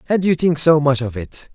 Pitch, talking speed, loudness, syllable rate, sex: 145 Hz, 275 wpm, -16 LUFS, 5.2 syllables/s, male